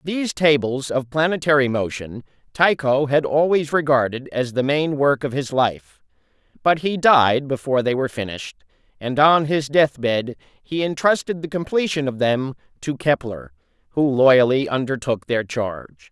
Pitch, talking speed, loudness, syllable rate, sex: 140 Hz, 155 wpm, -20 LUFS, 4.7 syllables/s, male